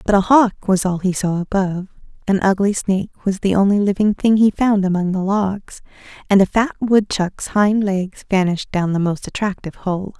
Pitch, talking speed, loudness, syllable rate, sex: 195 Hz, 195 wpm, -18 LUFS, 5.1 syllables/s, female